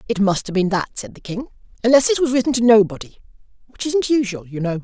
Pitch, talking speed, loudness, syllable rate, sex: 225 Hz, 235 wpm, -18 LUFS, 6.3 syllables/s, male